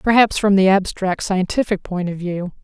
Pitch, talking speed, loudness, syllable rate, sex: 190 Hz, 180 wpm, -18 LUFS, 4.7 syllables/s, female